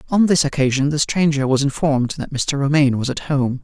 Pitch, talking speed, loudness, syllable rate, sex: 140 Hz, 215 wpm, -18 LUFS, 5.8 syllables/s, male